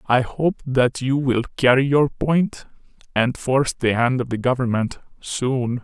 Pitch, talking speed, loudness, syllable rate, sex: 130 Hz, 165 wpm, -20 LUFS, 4.2 syllables/s, female